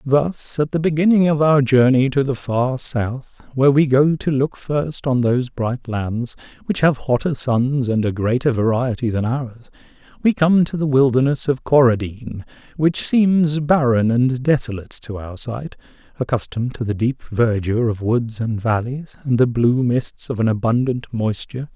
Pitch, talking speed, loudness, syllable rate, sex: 130 Hz, 175 wpm, -19 LUFS, 4.6 syllables/s, male